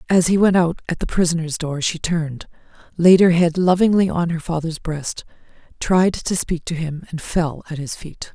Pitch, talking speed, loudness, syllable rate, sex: 170 Hz, 200 wpm, -19 LUFS, 4.9 syllables/s, female